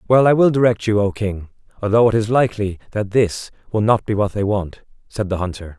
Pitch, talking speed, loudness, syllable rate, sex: 105 Hz, 230 wpm, -18 LUFS, 5.7 syllables/s, male